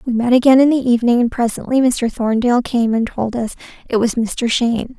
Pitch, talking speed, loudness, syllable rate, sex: 240 Hz, 215 wpm, -16 LUFS, 5.7 syllables/s, female